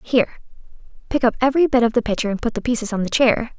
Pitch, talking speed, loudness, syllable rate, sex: 240 Hz, 250 wpm, -19 LUFS, 7.6 syllables/s, female